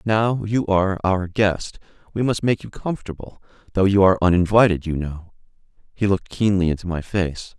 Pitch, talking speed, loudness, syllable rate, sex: 95 Hz, 165 wpm, -20 LUFS, 5.5 syllables/s, male